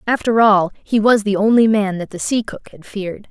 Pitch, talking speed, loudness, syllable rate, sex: 210 Hz, 235 wpm, -16 LUFS, 5.2 syllables/s, female